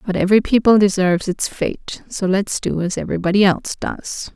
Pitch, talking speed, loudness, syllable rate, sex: 195 Hz, 180 wpm, -18 LUFS, 5.6 syllables/s, female